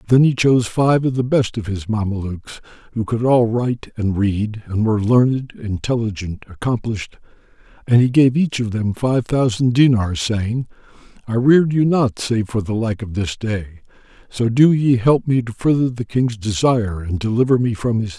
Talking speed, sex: 220 wpm, male